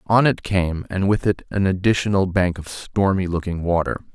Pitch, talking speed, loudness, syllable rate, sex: 95 Hz, 190 wpm, -21 LUFS, 5.0 syllables/s, male